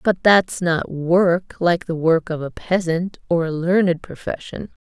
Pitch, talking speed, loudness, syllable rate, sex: 175 Hz, 175 wpm, -19 LUFS, 3.9 syllables/s, female